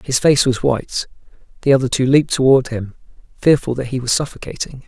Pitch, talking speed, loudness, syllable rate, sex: 130 Hz, 185 wpm, -17 LUFS, 6.2 syllables/s, male